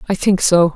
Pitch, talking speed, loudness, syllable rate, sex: 185 Hz, 240 wpm, -14 LUFS, 5.3 syllables/s, female